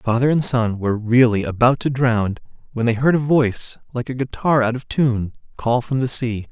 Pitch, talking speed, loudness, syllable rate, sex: 120 Hz, 210 wpm, -19 LUFS, 5.1 syllables/s, male